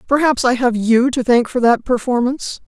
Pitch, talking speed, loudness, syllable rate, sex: 245 Hz, 195 wpm, -16 LUFS, 5.2 syllables/s, female